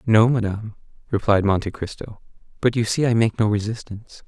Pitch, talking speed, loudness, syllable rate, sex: 110 Hz, 170 wpm, -21 LUFS, 5.9 syllables/s, male